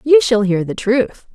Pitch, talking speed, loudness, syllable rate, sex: 235 Hz, 220 wpm, -16 LUFS, 4.1 syllables/s, female